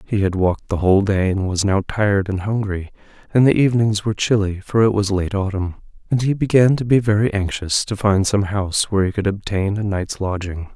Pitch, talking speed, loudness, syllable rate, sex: 100 Hz, 225 wpm, -19 LUFS, 5.7 syllables/s, male